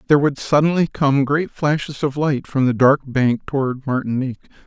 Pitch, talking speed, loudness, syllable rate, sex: 140 Hz, 180 wpm, -19 LUFS, 5.3 syllables/s, male